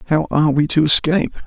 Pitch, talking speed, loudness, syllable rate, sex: 155 Hz, 205 wpm, -16 LUFS, 5.8 syllables/s, male